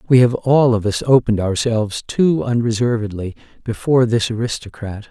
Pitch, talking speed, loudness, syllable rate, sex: 115 Hz, 140 wpm, -17 LUFS, 5.5 syllables/s, male